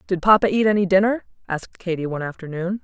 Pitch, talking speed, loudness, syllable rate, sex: 190 Hz, 190 wpm, -20 LUFS, 6.9 syllables/s, female